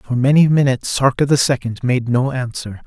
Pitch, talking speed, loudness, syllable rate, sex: 130 Hz, 190 wpm, -16 LUFS, 5.4 syllables/s, male